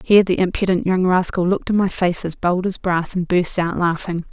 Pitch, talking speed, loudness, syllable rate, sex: 180 Hz, 235 wpm, -19 LUFS, 5.5 syllables/s, female